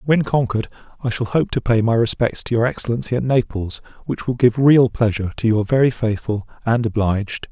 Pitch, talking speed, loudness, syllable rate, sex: 115 Hz, 200 wpm, -19 LUFS, 5.8 syllables/s, male